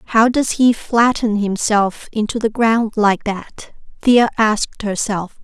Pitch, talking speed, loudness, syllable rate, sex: 220 Hz, 145 wpm, -16 LUFS, 3.6 syllables/s, female